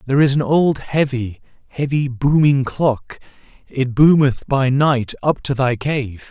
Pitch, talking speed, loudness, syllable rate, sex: 135 Hz, 150 wpm, -17 LUFS, 4.0 syllables/s, male